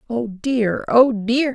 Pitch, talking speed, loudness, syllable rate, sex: 235 Hz, 155 wpm, -18 LUFS, 3.0 syllables/s, female